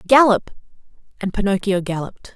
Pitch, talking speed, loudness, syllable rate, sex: 200 Hz, 100 wpm, -19 LUFS, 6.0 syllables/s, female